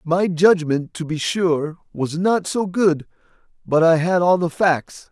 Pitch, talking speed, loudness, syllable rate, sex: 170 Hz, 175 wpm, -19 LUFS, 4.0 syllables/s, male